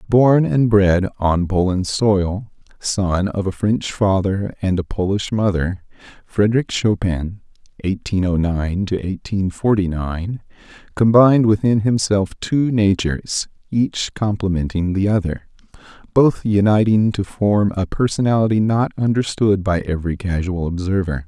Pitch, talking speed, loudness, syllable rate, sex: 100 Hz, 125 wpm, -18 LUFS, 3.8 syllables/s, male